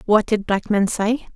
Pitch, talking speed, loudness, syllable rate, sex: 215 Hz, 220 wpm, -20 LUFS, 4.3 syllables/s, female